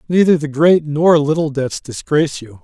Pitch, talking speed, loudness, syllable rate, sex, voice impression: 150 Hz, 180 wpm, -15 LUFS, 4.9 syllables/s, male, masculine, adult-like, cool, sincere, slightly calm, slightly kind